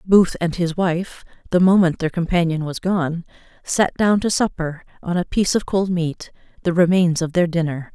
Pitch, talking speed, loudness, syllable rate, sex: 175 Hz, 190 wpm, -19 LUFS, 4.9 syllables/s, female